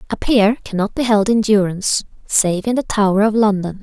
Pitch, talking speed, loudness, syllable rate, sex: 210 Hz, 205 wpm, -16 LUFS, 5.4 syllables/s, female